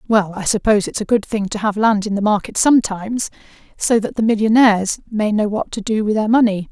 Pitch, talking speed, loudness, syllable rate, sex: 210 Hz, 230 wpm, -17 LUFS, 6.0 syllables/s, female